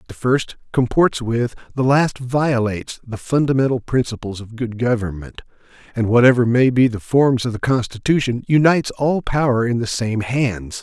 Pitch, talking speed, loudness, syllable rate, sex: 120 Hz, 160 wpm, -18 LUFS, 4.9 syllables/s, male